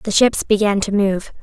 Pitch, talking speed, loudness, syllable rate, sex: 205 Hz, 210 wpm, -17 LUFS, 4.6 syllables/s, female